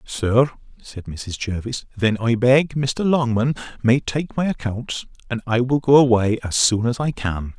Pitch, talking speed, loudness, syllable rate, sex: 120 Hz, 180 wpm, -20 LUFS, 4.2 syllables/s, male